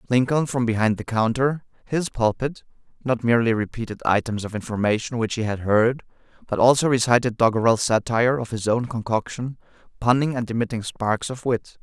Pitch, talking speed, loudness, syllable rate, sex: 120 Hz, 150 wpm, -22 LUFS, 5.5 syllables/s, male